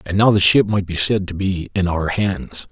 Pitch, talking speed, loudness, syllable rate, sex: 95 Hz, 265 wpm, -18 LUFS, 4.7 syllables/s, male